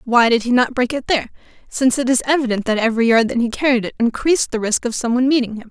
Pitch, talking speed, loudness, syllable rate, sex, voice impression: 245 Hz, 265 wpm, -17 LUFS, 7.3 syllables/s, female, feminine, adult-like, tensed, unique, slightly intense